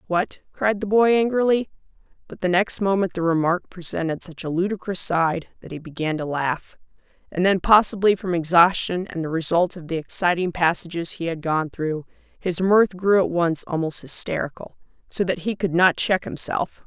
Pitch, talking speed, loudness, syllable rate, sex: 180 Hz, 180 wpm, -22 LUFS, 5.0 syllables/s, female